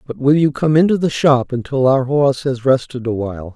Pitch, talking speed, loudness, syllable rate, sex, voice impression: 135 Hz, 220 wpm, -16 LUFS, 5.6 syllables/s, male, very masculine, old, thick, relaxed, slightly powerful, slightly dark, slightly soft, clear, fluent, slightly cool, intellectual, slightly refreshing, sincere, calm, slightly friendly, slightly reassuring, unique, slightly elegant, wild, slightly sweet, lively, slightly strict, slightly intense